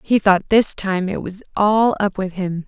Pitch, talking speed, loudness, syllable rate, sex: 195 Hz, 225 wpm, -18 LUFS, 4.2 syllables/s, female